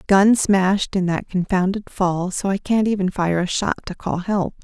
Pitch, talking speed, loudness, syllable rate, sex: 190 Hz, 205 wpm, -20 LUFS, 4.6 syllables/s, female